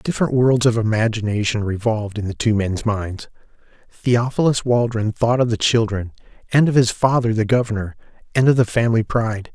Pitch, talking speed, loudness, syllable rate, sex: 115 Hz, 170 wpm, -19 LUFS, 5.5 syllables/s, male